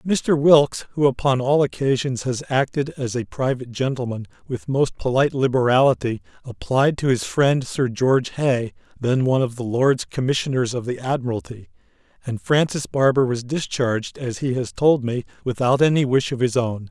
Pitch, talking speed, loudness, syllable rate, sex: 130 Hz, 170 wpm, -21 LUFS, 5.1 syllables/s, male